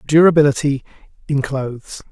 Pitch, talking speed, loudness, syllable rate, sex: 145 Hz, 85 wpm, -17 LUFS, 5.5 syllables/s, male